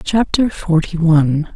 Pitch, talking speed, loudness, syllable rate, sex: 175 Hz, 115 wpm, -15 LUFS, 4.1 syllables/s, female